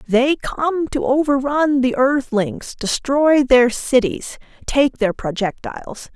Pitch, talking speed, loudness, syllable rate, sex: 265 Hz, 115 wpm, -18 LUFS, 3.6 syllables/s, female